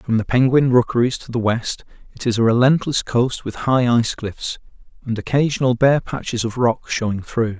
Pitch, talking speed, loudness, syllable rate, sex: 120 Hz, 190 wpm, -19 LUFS, 5.1 syllables/s, male